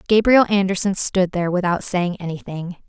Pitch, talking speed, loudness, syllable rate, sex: 185 Hz, 145 wpm, -19 LUFS, 5.3 syllables/s, female